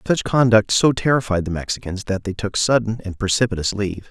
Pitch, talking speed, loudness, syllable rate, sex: 105 Hz, 190 wpm, -19 LUFS, 5.9 syllables/s, male